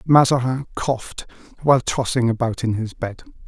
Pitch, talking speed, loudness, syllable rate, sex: 125 Hz, 140 wpm, -21 LUFS, 5.2 syllables/s, male